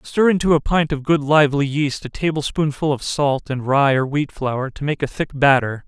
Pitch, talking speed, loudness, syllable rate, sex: 145 Hz, 235 wpm, -19 LUFS, 5.0 syllables/s, male